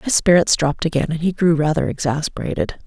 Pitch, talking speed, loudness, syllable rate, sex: 165 Hz, 190 wpm, -18 LUFS, 6.3 syllables/s, female